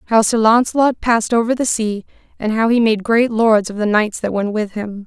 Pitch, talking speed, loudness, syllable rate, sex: 220 Hz, 235 wpm, -16 LUFS, 5.3 syllables/s, female